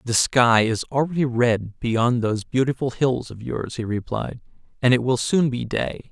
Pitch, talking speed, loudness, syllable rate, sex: 120 Hz, 185 wpm, -22 LUFS, 4.6 syllables/s, male